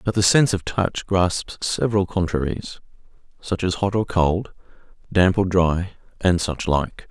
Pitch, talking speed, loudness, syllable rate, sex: 95 Hz, 150 wpm, -21 LUFS, 4.5 syllables/s, male